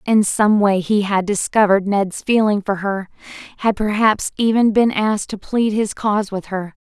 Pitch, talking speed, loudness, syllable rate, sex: 205 Hz, 185 wpm, -17 LUFS, 4.8 syllables/s, female